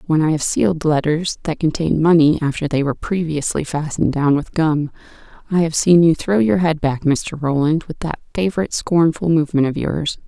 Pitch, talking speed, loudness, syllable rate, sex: 160 Hz, 195 wpm, -18 LUFS, 5.5 syllables/s, female